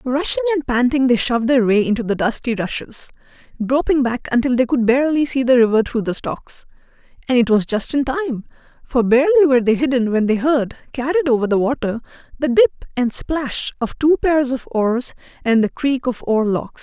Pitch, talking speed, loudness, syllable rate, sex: 255 Hz, 195 wpm, -18 LUFS, 5.6 syllables/s, female